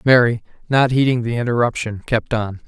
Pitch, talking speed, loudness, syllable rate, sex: 120 Hz, 155 wpm, -18 LUFS, 5.3 syllables/s, male